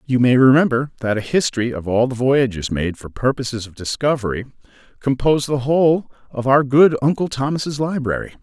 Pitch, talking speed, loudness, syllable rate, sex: 130 Hz, 170 wpm, -18 LUFS, 5.6 syllables/s, male